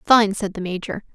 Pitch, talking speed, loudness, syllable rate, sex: 200 Hz, 210 wpm, -21 LUFS, 5.3 syllables/s, female